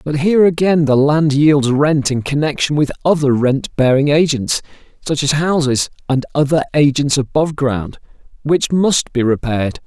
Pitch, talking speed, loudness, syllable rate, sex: 145 Hz, 160 wpm, -15 LUFS, 4.7 syllables/s, male